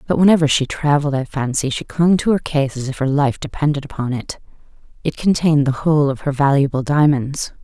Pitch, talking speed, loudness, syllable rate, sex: 145 Hz, 205 wpm, -17 LUFS, 5.9 syllables/s, female